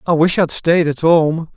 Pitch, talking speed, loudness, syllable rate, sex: 165 Hz, 270 wpm, -15 LUFS, 5.1 syllables/s, male